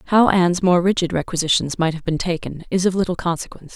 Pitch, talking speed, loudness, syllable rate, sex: 175 Hz, 210 wpm, -19 LUFS, 6.3 syllables/s, female